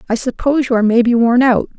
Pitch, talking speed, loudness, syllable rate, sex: 245 Hz, 235 wpm, -14 LUFS, 7.1 syllables/s, female